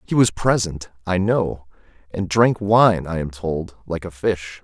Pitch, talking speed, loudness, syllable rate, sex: 95 Hz, 180 wpm, -20 LUFS, 3.9 syllables/s, male